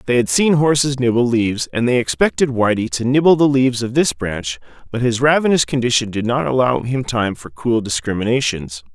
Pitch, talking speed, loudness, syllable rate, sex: 125 Hz, 195 wpm, -17 LUFS, 5.5 syllables/s, male